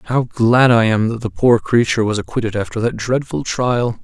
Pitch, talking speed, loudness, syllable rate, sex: 115 Hz, 210 wpm, -16 LUFS, 5.2 syllables/s, male